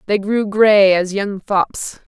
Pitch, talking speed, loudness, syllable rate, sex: 200 Hz, 165 wpm, -15 LUFS, 3.2 syllables/s, female